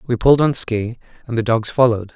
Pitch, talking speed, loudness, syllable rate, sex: 120 Hz, 220 wpm, -17 LUFS, 6.4 syllables/s, male